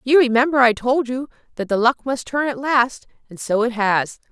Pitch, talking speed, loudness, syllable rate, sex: 245 Hz, 225 wpm, -19 LUFS, 5.0 syllables/s, female